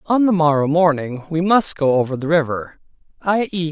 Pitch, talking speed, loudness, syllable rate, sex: 160 Hz, 195 wpm, -18 LUFS, 5.1 syllables/s, male